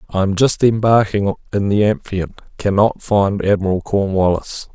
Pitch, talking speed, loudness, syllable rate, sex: 100 Hz, 140 wpm, -17 LUFS, 4.6 syllables/s, male